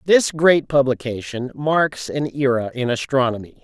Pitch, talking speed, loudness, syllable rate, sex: 135 Hz, 130 wpm, -19 LUFS, 4.4 syllables/s, male